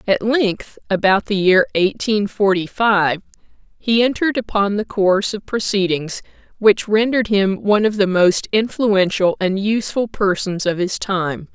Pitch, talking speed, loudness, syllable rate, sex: 200 Hz, 150 wpm, -17 LUFS, 4.5 syllables/s, female